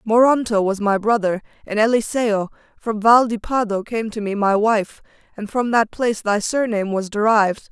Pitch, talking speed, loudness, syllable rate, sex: 215 Hz, 180 wpm, -19 LUFS, 5.1 syllables/s, female